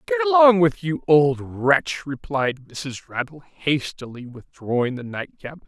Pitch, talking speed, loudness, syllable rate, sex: 150 Hz, 135 wpm, -21 LUFS, 3.8 syllables/s, male